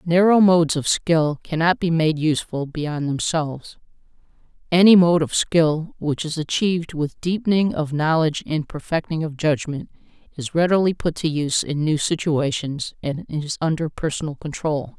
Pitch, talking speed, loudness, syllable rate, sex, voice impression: 160 Hz, 150 wpm, -20 LUFS, 4.8 syllables/s, female, feminine, middle-aged, tensed, powerful, slightly hard, clear, fluent, intellectual, calm, slightly wild, lively, sharp